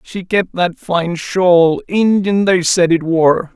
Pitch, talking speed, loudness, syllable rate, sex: 180 Hz, 170 wpm, -14 LUFS, 3.2 syllables/s, male